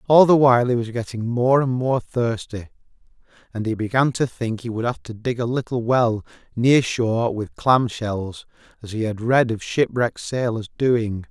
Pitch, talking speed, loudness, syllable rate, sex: 115 Hz, 190 wpm, -21 LUFS, 4.7 syllables/s, male